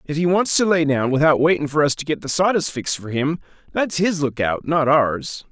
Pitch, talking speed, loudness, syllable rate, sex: 150 Hz, 240 wpm, -19 LUFS, 5.4 syllables/s, male